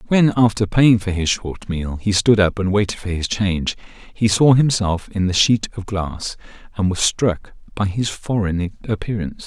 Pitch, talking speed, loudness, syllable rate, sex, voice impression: 100 Hz, 190 wpm, -19 LUFS, 4.7 syllables/s, male, very masculine, very adult-like, middle-aged, very thick, slightly relaxed, very powerful, bright, soft, very muffled, fluent, slightly raspy, very cool, very intellectual, slightly refreshing, sincere, very calm, very mature, friendly, very reassuring, unique, very elegant, slightly wild, very sweet, slightly lively, very kind, modest